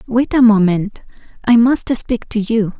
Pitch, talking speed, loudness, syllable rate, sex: 225 Hz, 170 wpm, -14 LUFS, 4.0 syllables/s, female